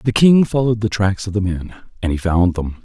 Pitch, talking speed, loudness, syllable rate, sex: 105 Hz, 255 wpm, -17 LUFS, 5.8 syllables/s, male